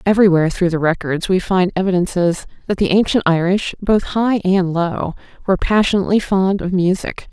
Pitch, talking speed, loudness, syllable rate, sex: 185 Hz, 165 wpm, -17 LUFS, 5.5 syllables/s, female